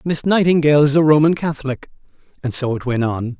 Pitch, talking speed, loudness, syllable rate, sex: 145 Hz, 195 wpm, -16 LUFS, 6.2 syllables/s, male